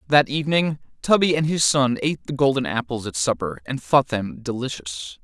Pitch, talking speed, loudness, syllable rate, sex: 135 Hz, 185 wpm, -22 LUFS, 5.4 syllables/s, male